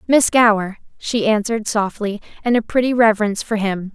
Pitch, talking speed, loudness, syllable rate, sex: 215 Hz, 165 wpm, -18 LUFS, 5.7 syllables/s, female